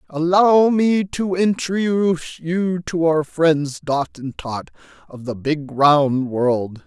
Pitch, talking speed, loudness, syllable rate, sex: 160 Hz, 140 wpm, -19 LUFS, 3.3 syllables/s, male